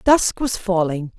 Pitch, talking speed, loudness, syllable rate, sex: 195 Hz, 150 wpm, -20 LUFS, 3.8 syllables/s, female